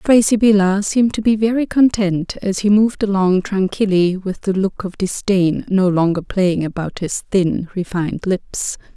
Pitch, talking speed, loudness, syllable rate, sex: 195 Hz, 165 wpm, -17 LUFS, 4.6 syllables/s, female